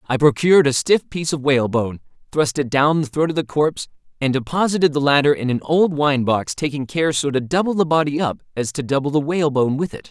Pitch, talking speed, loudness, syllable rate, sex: 145 Hz, 230 wpm, -19 LUFS, 6.2 syllables/s, male